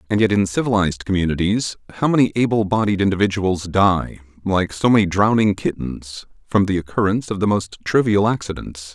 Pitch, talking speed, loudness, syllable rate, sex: 100 Hz, 160 wpm, -19 LUFS, 5.6 syllables/s, male